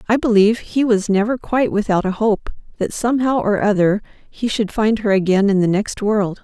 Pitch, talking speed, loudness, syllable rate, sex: 210 Hz, 205 wpm, -17 LUFS, 5.4 syllables/s, female